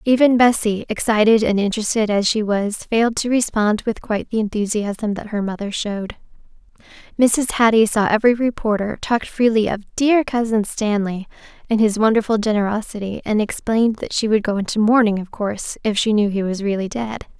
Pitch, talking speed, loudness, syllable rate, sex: 215 Hz, 175 wpm, -19 LUFS, 5.5 syllables/s, female